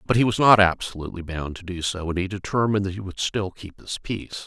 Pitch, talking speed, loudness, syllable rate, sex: 95 Hz, 255 wpm, -23 LUFS, 6.2 syllables/s, male